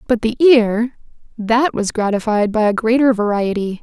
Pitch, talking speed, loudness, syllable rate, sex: 225 Hz, 140 wpm, -16 LUFS, 4.6 syllables/s, female